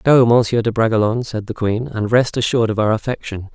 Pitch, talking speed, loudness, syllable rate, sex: 115 Hz, 220 wpm, -17 LUFS, 6.2 syllables/s, male